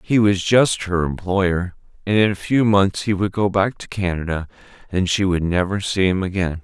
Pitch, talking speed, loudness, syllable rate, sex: 95 Hz, 210 wpm, -19 LUFS, 4.8 syllables/s, male